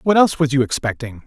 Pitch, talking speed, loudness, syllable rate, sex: 140 Hz, 235 wpm, -18 LUFS, 6.9 syllables/s, male